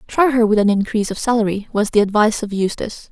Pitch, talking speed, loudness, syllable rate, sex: 215 Hz, 230 wpm, -17 LUFS, 6.8 syllables/s, female